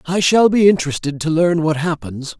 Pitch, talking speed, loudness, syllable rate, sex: 165 Hz, 200 wpm, -16 LUFS, 5.3 syllables/s, male